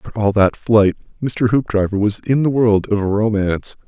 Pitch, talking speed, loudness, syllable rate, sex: 110 Hz, 185 wpm, -17 LUFS, 4.7 syllables/s, male